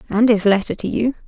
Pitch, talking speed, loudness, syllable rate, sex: 215 Hz, 235 wpm, -18 LUFS, 6.0 syllables/s, female